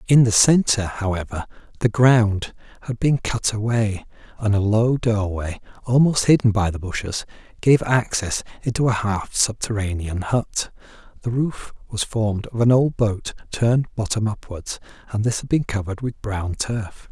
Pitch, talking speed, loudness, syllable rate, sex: 110 Hz, 160 wpm, -21 LUFS, 4.6 syllables/s, male